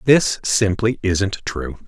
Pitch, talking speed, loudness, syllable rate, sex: 100 Hz, 130 wpm, -19 LUFS, 3.2 syllables/s, male